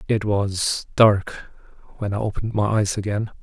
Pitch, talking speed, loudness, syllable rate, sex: 105 Hz, 160 wpm, -21 LUFS, 4.2 syllables/s, male